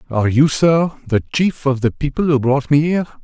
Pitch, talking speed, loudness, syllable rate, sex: 140 Hz, 225 wpm, -16 LUFS, 5.4 syllables/s, male